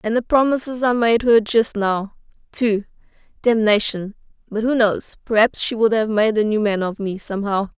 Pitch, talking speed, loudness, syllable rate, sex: 220 Hz, 160 wpm, -19 LUFS, 5.0 syllables/s, female